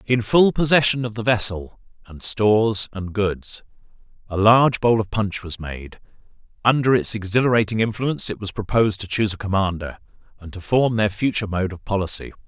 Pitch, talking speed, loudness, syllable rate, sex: 105 Hz, 175 wpm, -20 LUFS, 5.5 syllables/s, male